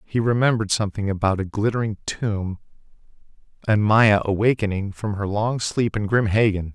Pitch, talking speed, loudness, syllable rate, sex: 105 Hz, 150 wpm, -21 LUFS, 5.3 syllables/s, male